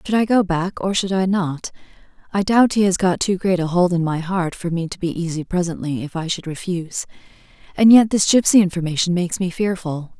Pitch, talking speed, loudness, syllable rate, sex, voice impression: 180 Hz, 210 wpm, -19 LUFS, 5.5 syllables/s, female, feminine, adult-like, tensed, slightly powerful, slightly bright, clear, fluent, intellectual, calm, elegant, lively, slightly sharp